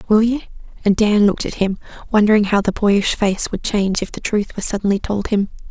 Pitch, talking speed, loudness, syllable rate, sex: 205 Hz, 220 wpm, -18 LUFS, 6.2 syllables/s, female